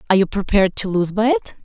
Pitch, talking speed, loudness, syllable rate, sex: 210 Hz, 255 wpm, -18 LUFS, 7.4 syllables/s, female